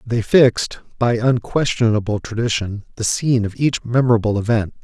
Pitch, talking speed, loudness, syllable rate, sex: 115 Hz, 135 wpm, -18 LUFS, 5.3 syllables/s, male